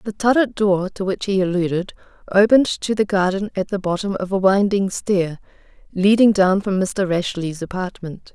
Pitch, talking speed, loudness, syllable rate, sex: 195 Hz, 175 wpm, -19 LUFS, 4.9 syllables/s, female